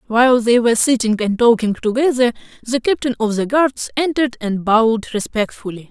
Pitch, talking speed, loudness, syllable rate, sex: 235 Hz, 165 wpm, -16 LUFS, 5.6 syllables/s, female